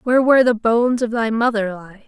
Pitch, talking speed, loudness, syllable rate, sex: 230 Hz, 230 wpm, -17 LUFS, 6.7 syllables/s, female